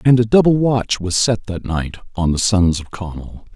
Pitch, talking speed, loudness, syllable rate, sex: 100 Hz, 220 wpm, -17 LUFS, 4.7 syllables/s, male